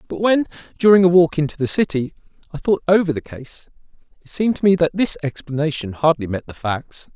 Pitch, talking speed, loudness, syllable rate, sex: 160 Hz, 200 wpm, -18 LUFS, 5.9 syllables/s, male